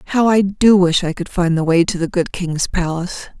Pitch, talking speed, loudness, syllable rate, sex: 180 Hz, 245 wpm, -16 LUFS, 5.5 syllables/s, female